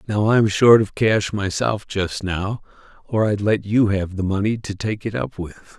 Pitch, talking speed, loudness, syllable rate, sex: 105 Hz, 210 wpm, -20 LUFS, 4.2 syllables/s, male